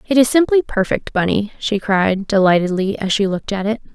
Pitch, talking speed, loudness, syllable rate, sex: 210 Hz, 200 wpm, -17 LUFS, 5.5 syllables/s, female